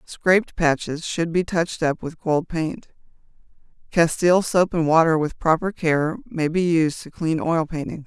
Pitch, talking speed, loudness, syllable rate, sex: 165 Hz, 170 wpm, -21 LUFS, 4.5 syllables/s, female